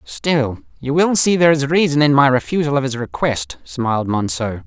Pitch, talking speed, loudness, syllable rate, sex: 135 Hz, 195 wpm, -17 LUFS, 5.0 syllables/s, male